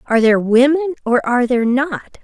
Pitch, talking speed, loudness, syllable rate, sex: 255 Hz, 190 wpm, -15 LUFS, 6.6 syllables/s, female